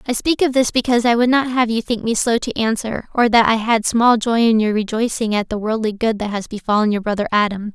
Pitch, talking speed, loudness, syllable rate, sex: 225 Hz, 265 wpm, -17 LUFS, 5.9 syllables/s, female